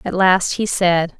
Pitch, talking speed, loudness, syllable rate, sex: 180 Hz, 200 wpm, -16 LUFS, 3.8 syllables/s, female